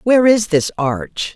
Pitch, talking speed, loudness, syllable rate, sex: 195 Hz, 180 wpm, -16 LUFS, 4.2 syllables/s, female